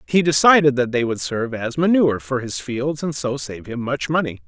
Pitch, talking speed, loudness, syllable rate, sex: 135 Hz, 230 wpm, -19 LUFS, 5.4 syllables/s, male